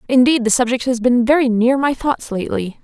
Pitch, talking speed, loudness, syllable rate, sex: 245 Hz, 210 wpm, -16 LUFS, 5.7 syllables/s, female